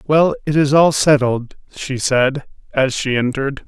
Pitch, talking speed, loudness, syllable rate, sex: 140 Hz, 165 wpm, -16 LUFS, 4.3 syllables/s, male